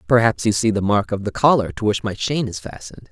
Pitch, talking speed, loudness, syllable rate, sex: 105 Hz, 270 wpm, -19 LUFS, 6.2 syllables/s, male